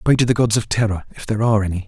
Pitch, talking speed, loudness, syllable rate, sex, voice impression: 110 Hz, 320 wpm, -19 LUFS, 8.3 syllables/s, male, masculine, adult-like, slightly soft, cool, sincere, slightly calm, slightly reassuring, slightly kind